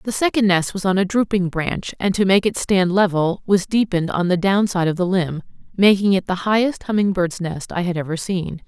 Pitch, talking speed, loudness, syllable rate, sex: 190 Hz, 230 wpm, -19 LUFS, 5.3 syllables/s, female